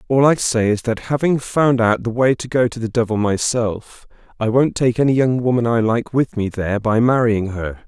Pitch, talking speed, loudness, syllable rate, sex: 120 Hz, 230 wpm, -18 LUFS, 5.0 syllables/s, male